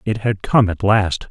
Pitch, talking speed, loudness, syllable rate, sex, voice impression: 105 Hz, 230 wpm, -17 LUFS, 4.2 syllables/s, male, very masculine, adult-like, slightly middle-aged, very thick, tensed, powerful, bright, slightly hard, slightly muffled, fluent, cool, very intellectual, slightly refreshing, sincere, very calm, very mature, friendly, reassuring, very unique, elegant, wild, sweet, slightly lively, kind, intense